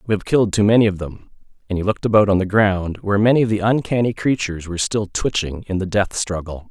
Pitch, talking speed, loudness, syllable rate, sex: 100 Hz, 240 wpm, -19 LUFS, 6.5 syllables/s, male